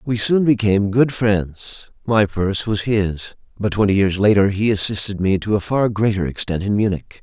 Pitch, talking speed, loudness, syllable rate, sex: 105 Hz, 190 wpm, -18 LUFS, 5.3 syllables/s, male